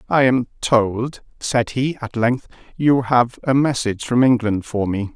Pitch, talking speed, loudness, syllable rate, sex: 120 Hz, 175 wpm, -19 LUFS, 4.1 syllables/s, male